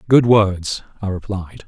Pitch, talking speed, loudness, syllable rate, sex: 100 Hz, 145 wpm, -18 LUFS, 3.9 syllables/s, male